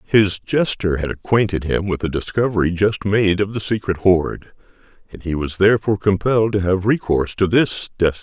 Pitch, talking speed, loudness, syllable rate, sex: 95 Hz, 190 wpm, -18 LUFS, 5.7 syllables/s, male